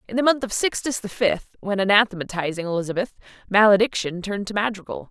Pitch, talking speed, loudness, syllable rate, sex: 205 Hz, 165 wpm, -22 LUFS, 6.4 syllables/s, female